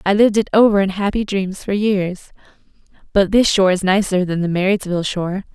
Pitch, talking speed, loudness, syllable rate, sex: 195 Hz, 195 wpm, -17 LUFS, 6.0 syllables/s, female